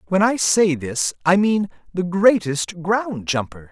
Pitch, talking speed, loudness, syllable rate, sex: 175 Hz, 160 wpm, -19 LUFS, 3.8 syllables/s, male